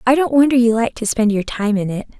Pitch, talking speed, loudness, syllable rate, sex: 230 Hz, 300 wpm, -16 LUFS, 6.1 syllables/s, female